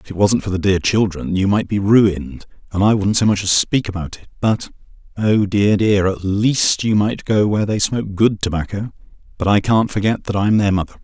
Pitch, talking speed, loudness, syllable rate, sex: 100 Hz, 220 wpm, -17 LUFS, 5.3 syllables/s, male